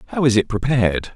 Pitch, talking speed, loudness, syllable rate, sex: 115 Hz, 210 wpm, -18 LUFS, 6.6 syllables/s, male